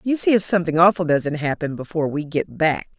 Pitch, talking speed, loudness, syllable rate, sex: 165 Hz, 220 wpm, -20 LUFS, 6.0 syllables/s, female